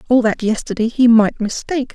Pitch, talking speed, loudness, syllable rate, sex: 230 Hz, 185 wpm, -16 LUFS, 5.7 syllables/s, female